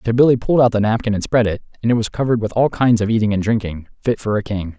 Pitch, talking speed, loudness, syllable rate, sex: 110 Hz, 300 wpm, -17 LUFS, 7.2 syllables/s, male